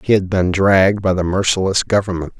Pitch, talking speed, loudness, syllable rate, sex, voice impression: 95 Hz, 200 wpm, -16 LUFS, 5.8 syllables/s, male, masculine, middle-aged, powerful, slightly dark, muffled, slightly raspy, cool, calm, mature, reassuring, wild, kind